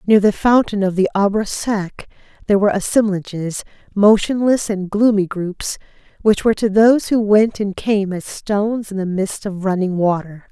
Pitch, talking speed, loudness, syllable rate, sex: 200 Hz, 170 wpm, -17 LUFS, 4.9 syllables/s, female